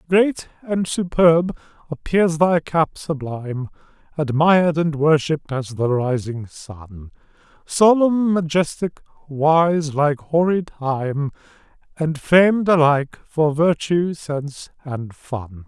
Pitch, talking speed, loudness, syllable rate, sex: 155 Hz, 105 wpm, -19 LUFS, 3.4 syllables/s, male